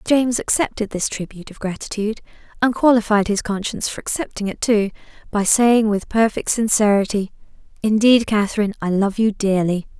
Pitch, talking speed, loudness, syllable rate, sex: 210 Hz, 150 wpm, -19 LUFS, 5.7 syllables/s, female